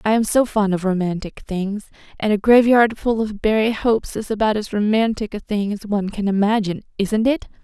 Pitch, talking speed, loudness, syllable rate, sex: 210 Hz, 205 wpm, -19 LUFS, 5.5 syllables/s, female